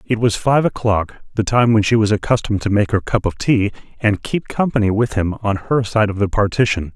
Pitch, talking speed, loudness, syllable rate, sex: 110 Hz, 235 wpm, -17 LUFS, 5.4 syllables/s, male